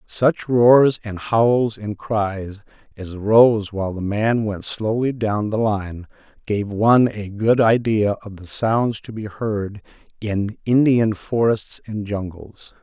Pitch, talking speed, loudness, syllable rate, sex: 105 Hz, 150 wpm, -19 LUFS, 3.6 syllables/s, male